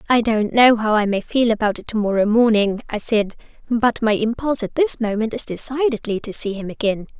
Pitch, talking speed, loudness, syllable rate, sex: 220 Hz, 210 wpm, -19 LUFS, 5.5 syllables/s, female